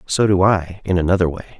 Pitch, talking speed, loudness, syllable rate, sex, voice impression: 90 Hz, 225 wpm, -17 LUFS, 6.2 syllables/s, male, masculine, adult-like, relaxed, weak, slightly dark, slightly muffled, slightly cool, sincere, calm, slightly friendly, kind, modest